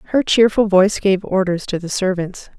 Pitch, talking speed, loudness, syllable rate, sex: 195 Hz, 185 wpm, -17 LUFS, 5.3 syllables/s, female